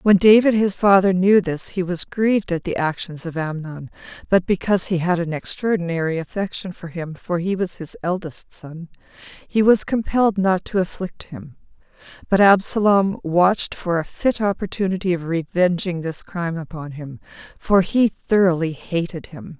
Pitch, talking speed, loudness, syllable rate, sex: 180 Hz, 165 wpm, -20 LUFS, 4.9 syllables/s, female